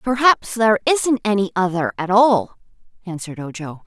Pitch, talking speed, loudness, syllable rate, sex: 205 Hz, 140 wpm, -18 LUFS, 5.1 syllables/s, female